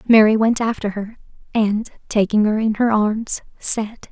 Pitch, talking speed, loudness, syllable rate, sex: 215 Hz, 160 wpm, -19 LUFS, 4.2 syllables/s, female